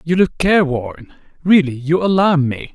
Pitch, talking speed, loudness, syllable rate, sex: 160 Hz, 155 wpm, -16 LUFS, 4.7 syllables/s, male